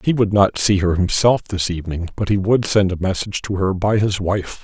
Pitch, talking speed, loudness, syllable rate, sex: 100 Hz, 245 wpm, -18 LUFS, 5.3 syllables/s, male